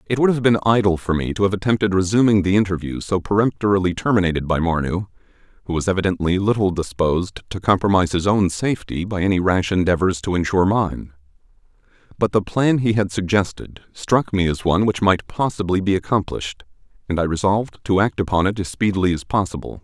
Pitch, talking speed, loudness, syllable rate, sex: 95 Hz, 185 wpm, -19 LUFS, 6.2 syllables/s, male